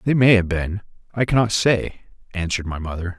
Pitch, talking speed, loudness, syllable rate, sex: 100 Hz, 190 wpm, -20 LUFS, 5.9 syllables/s, male